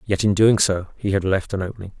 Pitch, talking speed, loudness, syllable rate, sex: 100 Hz, 270 wpm, -20 LUFS, 6.3 syllables/s, male